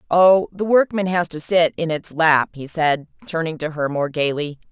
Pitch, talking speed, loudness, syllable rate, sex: 165 Hz, 205 wpm, -19 LUFS, 4.7 syllables/s, female